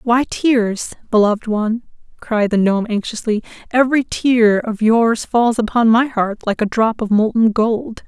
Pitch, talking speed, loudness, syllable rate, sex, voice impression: 225 Hz, 165 wpm, -16 LUFS, 4.5 syllables/s, female, slightly young, slightly adult-like, very thin, tensed, slightly powerful, bright, hard, clear, fluent, cool, very intellectual, refreshing, very sincere, calm, friendly, reassuring, unique, very elegant, sweet, lively, kind, slightly light